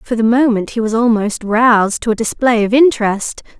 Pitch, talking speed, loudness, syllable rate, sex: 230 Hz, 200 wpm, -14 LUFS, 5.3 syllables/s, female